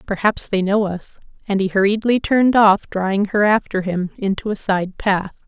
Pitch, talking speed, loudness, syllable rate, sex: 200 Hz, 185 wpm, -18 LUFS, 4.9 syllables/s, female